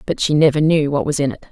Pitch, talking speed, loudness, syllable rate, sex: 145 Hz, 315 wpm, -16 LUFS, 6.6 syllables/s, female